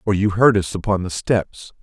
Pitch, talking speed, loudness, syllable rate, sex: 100 Hz, 230 wpm, -19 LUFS, 4.9 syllables/s, male